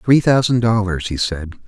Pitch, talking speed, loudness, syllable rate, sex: 105 Hz, 180 wpm, -17 LUFS, 4.8 syllables/s, male